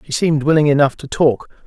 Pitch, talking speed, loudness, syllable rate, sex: 145 Hz, 215 wpm, -15 LUFS, 6.5 syllables/s, male